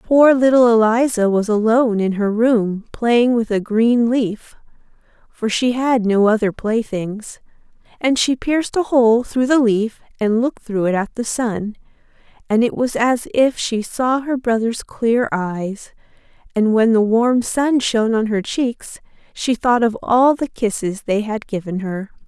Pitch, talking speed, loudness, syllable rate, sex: 230 Hz, 170 wpm, -17 LUFS, 4.1 syllables/s, female